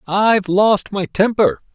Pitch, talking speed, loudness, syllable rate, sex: 200 Hz, 135 wpm, -16 LUFS, 4.0 syllables/s, male